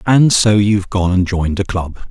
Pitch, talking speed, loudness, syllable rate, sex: 100 Hz, 230 wpm, -14 LUFS, 5.2 syllables/s, male